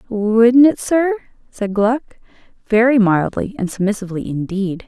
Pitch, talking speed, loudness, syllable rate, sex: 220 Hz, 125 wpm, -16 LUFS, 4.6 syllables/s, female